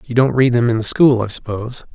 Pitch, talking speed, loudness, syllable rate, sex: 120 Hz, 275 wpm, -16 LUFS, 6.2 syllables/s, male